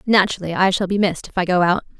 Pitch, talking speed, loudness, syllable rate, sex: 185 Hz, 270 wpm, -19 LUFS, 7.5 syllables/s, female